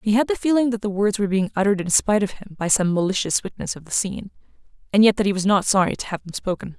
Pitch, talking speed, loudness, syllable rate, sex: 200 Hz, 285 wpm, -21 LUFS, 7.2 syllables/s, female